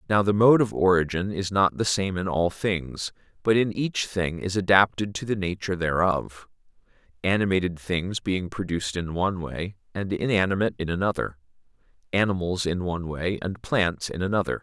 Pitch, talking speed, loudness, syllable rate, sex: 95 Hz, 170 wpm, -25 LUFS, 5.2 syllables/s, male